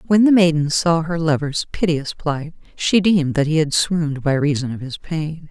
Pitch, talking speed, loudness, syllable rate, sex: 160 Hz, 205 wpm, -18 LUFS, 4.9 syllables/s, female